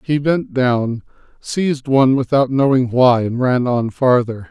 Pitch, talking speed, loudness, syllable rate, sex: 130 Hz, 160 wpm, -16 LUFS, 4.2 syllables/s, male